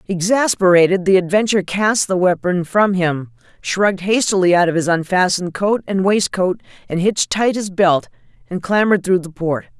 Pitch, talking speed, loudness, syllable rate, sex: 185 Hz, 160 wpm, -16 LUFS, 5.1 syllables/s, female